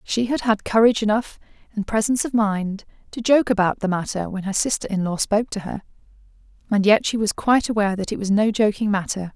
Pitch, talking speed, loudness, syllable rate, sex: 210 Hz, 220 wpm, -21 LUFS, 6.1 syllables/s, female